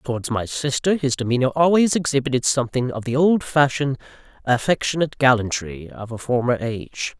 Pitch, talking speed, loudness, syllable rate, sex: 135 Hz, 140 wpm, -20 LUFS, 5.7 syllables/s, male